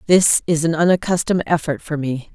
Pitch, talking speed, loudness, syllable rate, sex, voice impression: 160 Hz, 180 wpm, -18 LUFS, 5.9 syllables/s, female, feminine, very adult-like, intellectual, slightly elegant, slightly strict